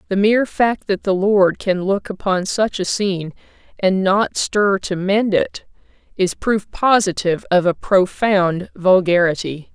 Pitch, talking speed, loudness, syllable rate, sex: 190 Hz, 155 wpm, -17 LUFS, 4.1 syllables/s, female